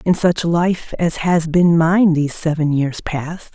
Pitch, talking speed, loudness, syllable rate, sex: 165 Hz, 185 wpm, -17 LUFS, 3.9 syllables/s, female